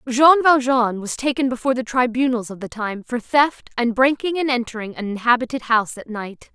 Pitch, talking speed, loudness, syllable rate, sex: 245 Hz, 190 wpm, -19 LUFS, 5.4 syllables/s, female